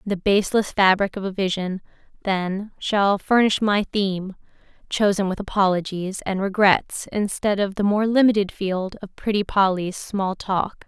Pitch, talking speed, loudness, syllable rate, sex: 195 Hz, 145 wpm, -21 LUFS, 4.5 syllables/s, female